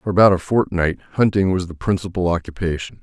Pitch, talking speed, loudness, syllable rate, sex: 90 Hz, 180 wpm, -19 LUFS, 6.1 syllables/s, male